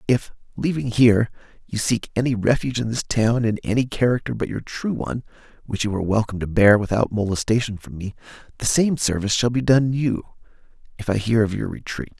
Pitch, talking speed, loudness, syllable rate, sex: 115 Hz, 195 wpm, -21 LUFS, 4.6 syllables/s, male